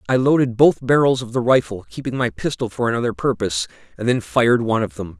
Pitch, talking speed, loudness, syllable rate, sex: 125 Hz, 220 wpm, -19 LUFS, 6.4 syllables/s, male